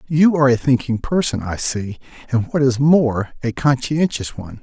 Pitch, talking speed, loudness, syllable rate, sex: 130 Hz, 180 wpm, -18 LUFS, 5.0 syllables/s, male